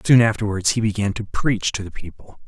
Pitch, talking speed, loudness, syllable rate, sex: 105 Hz, 220 wpm, -20 LUFS, 5.6 syllables/s, male